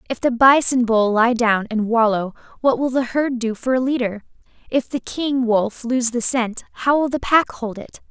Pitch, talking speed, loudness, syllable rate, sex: 240 Hz, 215 wpm, -19 LUFS, 4.6 syllables/s, female